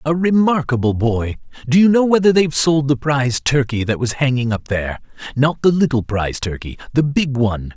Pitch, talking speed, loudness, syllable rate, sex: 135 Hz, 185 wpm, -17 LUFS, 5.6 syllables/s, male